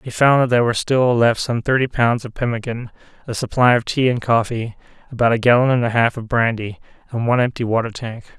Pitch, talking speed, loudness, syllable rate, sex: 120 Hz, 220 wpm, -18 LUFS, 6.1 syllables/s, male